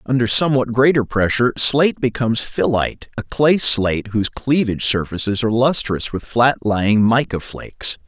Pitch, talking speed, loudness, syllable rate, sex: 120 Hz, 150 wpm, -17 LUFS, 5.4 syllables/s, male